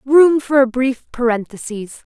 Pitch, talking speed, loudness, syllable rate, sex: 255 Hz, 140 wpm, -16 LUFS, 4.1 syllables/s, female